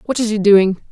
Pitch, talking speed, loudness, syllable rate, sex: 210 Hz, 265 wpm, -14 LUFS, 4.8 syllables/s, female